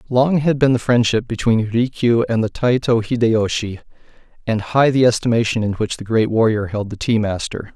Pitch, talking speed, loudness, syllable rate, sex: 115 Hz, 185 wpm, -18 LUFS, 5.1 syllables/s, male